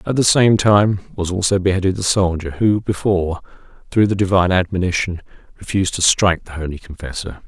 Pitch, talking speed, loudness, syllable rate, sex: 95 Hz, 170 wpm, -17 LUFS, 6.0 syllables/s, male